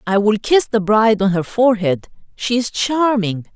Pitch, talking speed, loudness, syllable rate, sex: 215 Hz, 185 wpm, -16 LUFS, 4.9 syllables/s, female